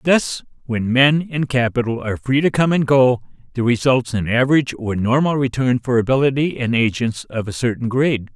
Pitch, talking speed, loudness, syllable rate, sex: 125 Hz, 185 wpm, -18 LUFS, 5.6 syllables/s, male